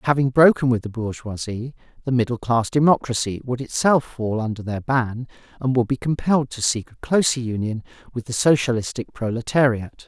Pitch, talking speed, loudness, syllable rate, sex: 120 Hz, 165 wpm, -21 LUFS, 5.4 syllables/s, male